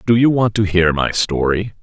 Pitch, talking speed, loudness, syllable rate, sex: 100 Hz, 230 wpm, -16 LUFS, 4.9 syllables/s, male